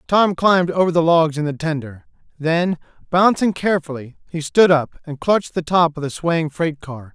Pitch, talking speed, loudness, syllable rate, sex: 165 Hz, 195 wpm, -18 LUFS, 5.2 syllables/s, male